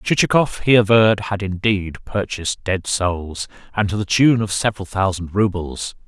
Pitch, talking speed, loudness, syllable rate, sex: 100 Hz, 160 wpm, -19 LUFS, 4.7 syllables/s, male